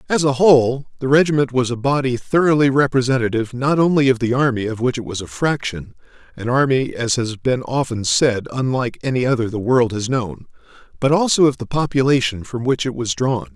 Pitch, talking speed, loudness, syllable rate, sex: 130 Hz, 200 wpm, -18 LUFS, 5.6 syllables/s, male